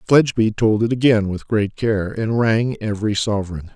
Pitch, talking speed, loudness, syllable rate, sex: 110 Hz, 175 wpm, -19 LUFS, 5.1 syllables/s, male